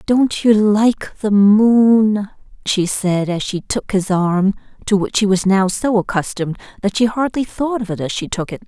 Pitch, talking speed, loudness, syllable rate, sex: 205 Hz, 200 wpm, -16 LUFS, 4.3 syllables/s, female